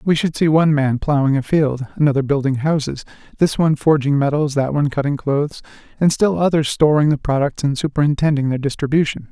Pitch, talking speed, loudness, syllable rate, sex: 145 Hz, 185 wpm, -17 LUFS, 6.1 syllables/s, male